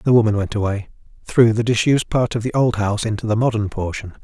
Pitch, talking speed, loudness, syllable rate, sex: 110 Hz, 210 wpm, -19 LUFS, 6.5 syllables/s, male